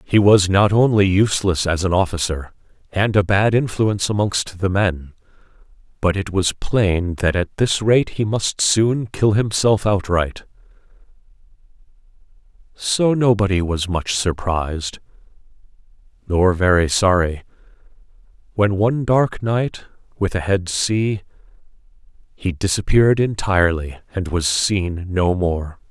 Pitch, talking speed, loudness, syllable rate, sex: 95 Hz, 125 wpm, -18 LUFS, 4.2 syllables/s, male